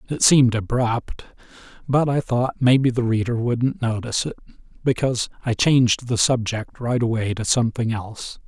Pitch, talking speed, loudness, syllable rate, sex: 120 Hz, 155 wpm, -21 LUFS, 5.1 syllables/s, male